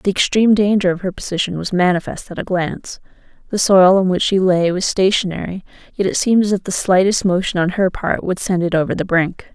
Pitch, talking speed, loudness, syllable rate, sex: 185 Hz, 225 wpm, -16 LUFS, 5.9 syllables/s, female